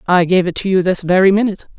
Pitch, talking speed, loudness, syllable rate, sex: 185 Hz, 270 wpm, -14 LUFS, 7.2 syllables/s, female